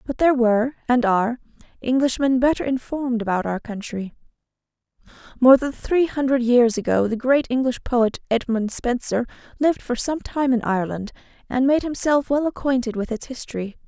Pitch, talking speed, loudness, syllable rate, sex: 250 Hz, 160 wpm, -21 LUFS, 5.5 syllables/s, female